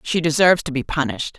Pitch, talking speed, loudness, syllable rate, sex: 150 Hz, 215 wpm, -19 LUFS, 7.0 syllables/s, female